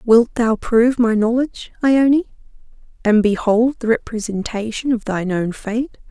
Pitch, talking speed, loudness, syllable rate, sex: 230 Hz, 140 wpm, -18 LUFS, 4.6 syllables/s, female